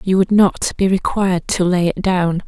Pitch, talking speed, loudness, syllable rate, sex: 185 Hz, 220 wpm, -16 LUFS, 4.8 syllables/s, female